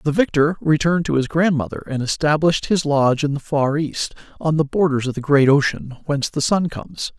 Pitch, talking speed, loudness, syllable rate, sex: 150 Hz, 210 wpm, -19 LUFS, 5.8 syllables/s, male